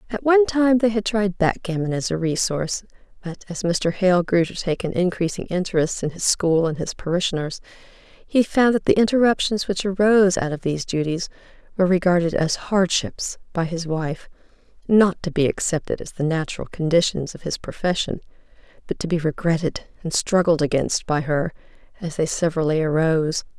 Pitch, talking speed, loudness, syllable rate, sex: 175 Hz, 175 wpm, -21 LUFS, 5.4 syllables/s, female